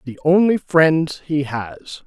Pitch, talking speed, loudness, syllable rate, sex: 155 Hz, 145 wpm, -17 LUFS, 3.3 syllables/s, male